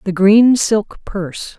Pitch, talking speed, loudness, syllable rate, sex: 205 Hz, 150 wpm, -13 LUFS, 3.6 syllables/s, female